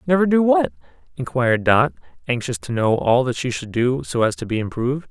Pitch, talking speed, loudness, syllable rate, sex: 125 Hz, 210 wpm, -20 LUFS, 5.8 syllables/s, male